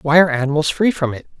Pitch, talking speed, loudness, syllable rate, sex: 150 Hz, 255 wpm, -17 LUFS, 7.1 syllables/s, male